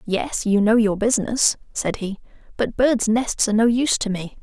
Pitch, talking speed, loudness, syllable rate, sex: 220 Hz, 205 wpm, -20 LUFS, 5.0 syllables/s, female